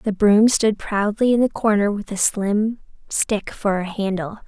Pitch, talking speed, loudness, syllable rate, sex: 210 Hz, 190 wpm, -20 LUFS, 4.3 syllables/s, female